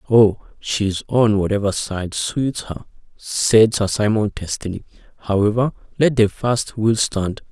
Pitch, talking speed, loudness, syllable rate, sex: 110 Hz, 135 wpm, -19 LUFS, 4.0 syllables/s, male